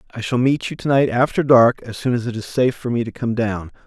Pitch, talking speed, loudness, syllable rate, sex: 120 Hz, 280 wpm, -19 LUFS, 6.2 syllables/s, male